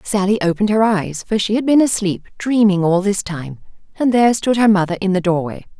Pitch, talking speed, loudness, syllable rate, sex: 200 Hz, 215 wpm, -16 LUFS, 5.8 syllables/s, female